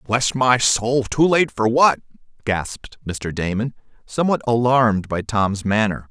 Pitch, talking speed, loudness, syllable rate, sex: 115 Hz, 145 wpm, -19 LUFS, 4.3 syllables/s, male